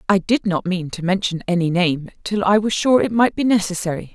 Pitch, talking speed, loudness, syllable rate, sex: 190 Hz, 215 wpm, -19 LUFS, 5.5 syllables/s, female